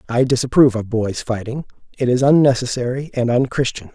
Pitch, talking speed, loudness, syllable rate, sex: 125 Hz, 150 wpm, -18 LUFS, 5.8 syllables/s, male